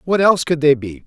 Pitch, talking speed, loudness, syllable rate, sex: 155 Hz, 280 wpm, -16 LUFS, 6.3 syllables/s, male